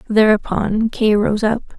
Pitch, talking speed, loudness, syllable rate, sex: 215 Hz, 135 wpm, -16 LUFS, 4.0 syllables/s, female